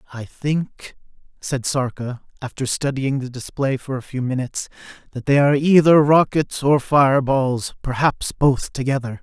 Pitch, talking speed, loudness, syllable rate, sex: 135 Hz, 145 wpm, -19 LUFS, 4.6 syllables/s, male